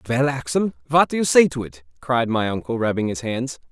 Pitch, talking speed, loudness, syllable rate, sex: 125 Hz, 225 wpm, -21 LUFS, 5.5 syllables/s, male